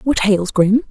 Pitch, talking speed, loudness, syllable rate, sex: 210 Hz, 200 wpm, -15 LUFS, 4.0 syllables/s, female